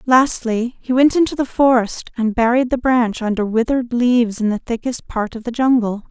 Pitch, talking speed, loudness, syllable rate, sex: 240 Hz, 195 wpm, -17 LUFS, 5.2 syllables/s, female